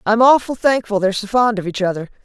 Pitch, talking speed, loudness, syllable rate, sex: 215 Hz, 240 wpm, -16 LUFS, 6.5 syllables/s, female